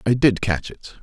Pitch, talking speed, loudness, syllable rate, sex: 110 Hz, 235 wpm, -20 LUFS, 4.6 syllables/s, male